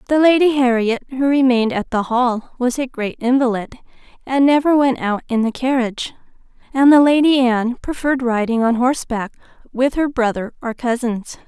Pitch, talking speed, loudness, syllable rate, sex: 250 Hz, 165 wpm, -17 LUFS, 5.3 syllables/s, female